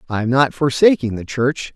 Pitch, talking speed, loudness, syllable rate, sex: 130 Hz, 205 wpm, -17 LUFS, 5.1 syllables/s, male